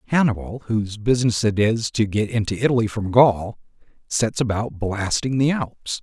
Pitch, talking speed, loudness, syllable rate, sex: 110 Hz, 160 wpm, -21 LUFS, 5.0 syllables/s, male